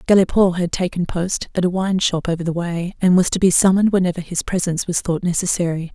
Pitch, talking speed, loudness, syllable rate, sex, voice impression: 175 Hz, 220 wpm, -18 LUFS, 6.1 syllables/s, female, feminine, adult-like, slightly soft, calm, slightly sweet